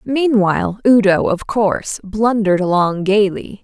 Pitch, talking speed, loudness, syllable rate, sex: 205 Hz, 115 wpm, -15 LUFS, 4.4 syllables/s, female